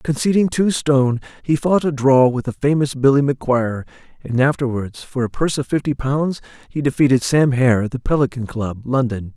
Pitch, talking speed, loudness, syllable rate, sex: 135 Hz, 185 wpm, -18 LUFS, 5.5 syllables/s, male